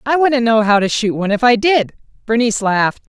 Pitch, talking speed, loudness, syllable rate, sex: 230 Hz, 225 wpm, -15 LUFS, 6.1 syllables/s, female